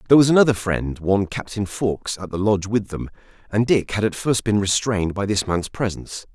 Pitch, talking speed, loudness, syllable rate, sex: 105 Hz, 215 wpm, -21 LUFS, 6.0 syllables/s, male